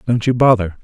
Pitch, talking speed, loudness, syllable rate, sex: 115 Hz, 215 wpm, -14 LUFS, 5.8 syllables/s, male